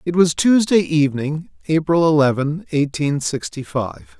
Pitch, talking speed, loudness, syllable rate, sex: 155 Hz, 130 wpm, -18 LUFS, 4.4 syllables/s, male